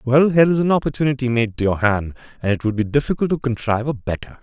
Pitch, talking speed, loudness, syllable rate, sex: 130 Hz, 245 wpm, -19 LUFS, 6.9 syllables/s, male